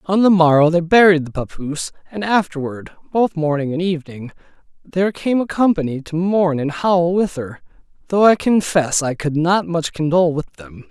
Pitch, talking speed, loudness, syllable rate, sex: 170 Hz, 180 wpm, -17 LUFS, 5.1 syllables/s, male